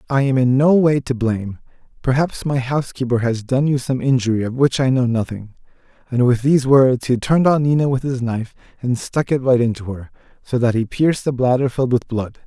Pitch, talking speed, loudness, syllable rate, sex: 130 Hz, 220 wpm, -18 LUFS, 5.8 syllables/s, male